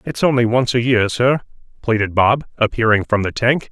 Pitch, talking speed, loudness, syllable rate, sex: 120 Hz, 195 wpm, -17 LUFS, 5.1 syllables/s, male